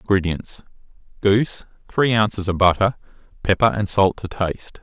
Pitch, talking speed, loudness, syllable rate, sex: 100 Hz, 125 wpm, -20 LUFS, 5.3 syllables/s, male